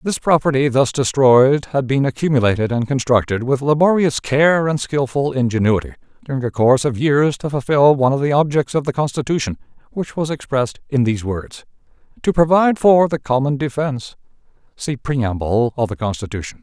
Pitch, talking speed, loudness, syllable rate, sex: 135 Hz, 165 wpm, -17 LUFS, 5.2 syllables/s, male